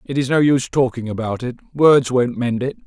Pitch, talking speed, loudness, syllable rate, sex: 130 Hz, 230 wpm, -18 LUFS, 5.6 syllables/s, male